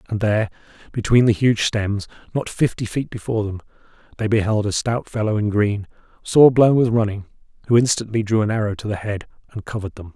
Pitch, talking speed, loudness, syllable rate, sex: 110 Hz, 195 wpm, -20 LUFS, 6.0 syllables/s, male